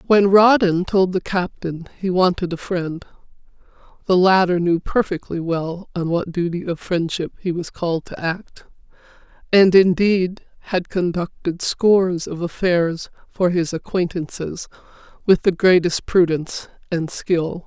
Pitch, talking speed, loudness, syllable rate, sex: 175 Hz, 135 wpm, -19 LUFS, 4.2 syllables/s, female